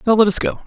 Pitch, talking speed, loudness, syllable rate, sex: 215 Hz, 360 wpm, -15 LUFS, 8.0 syllables/s, male